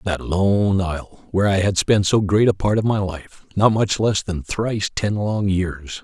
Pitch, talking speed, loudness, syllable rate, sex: 100 Hz, 210 wpm, -20 LUFS, 4.4 syllables/s, male